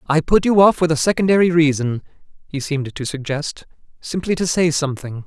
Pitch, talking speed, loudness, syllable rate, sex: 155 Hz, 180 wpm, -18 LUFS, 5.7 syllables/s, male